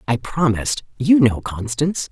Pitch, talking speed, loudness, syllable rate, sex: 135 Hz, 140 wpm, -19 LUFS, 5.0 syllables/s, female